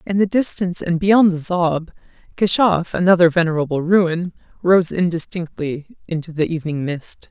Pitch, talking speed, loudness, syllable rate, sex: 175 Hz, 140 wpm, -18 LUFS, 5.1 syllables/s, female